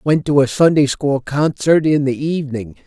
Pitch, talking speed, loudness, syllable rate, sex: 140 Hz, 190 wpm, -16 LUFS, 4.7 syllables/s, male